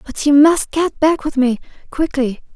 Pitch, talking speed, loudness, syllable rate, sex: 285 Hz, 190 wpm, -15 LUFS, 4.5 syllables/s, female